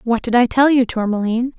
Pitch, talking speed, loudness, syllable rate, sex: 240 Hz, 225 wpm, -16 LUFS, 6.2 syllables/s, female